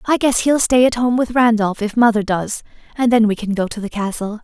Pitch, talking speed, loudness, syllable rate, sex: 225 Hz, 255 wpm, -16 LUFS, 5.5 syllables/s, female